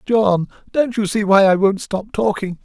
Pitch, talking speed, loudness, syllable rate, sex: 205 Hz, 205 wpm, -17 LUFS, 4.4 syllables/s, male